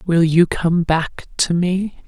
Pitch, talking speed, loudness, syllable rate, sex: 170 Hz, 175 wpm, -18 LUFS, 3.1 syllables/s, female